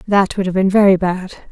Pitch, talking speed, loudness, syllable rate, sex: 190 Hz, 240 wpm, -15 LUFS, 5.8 syllables/s, female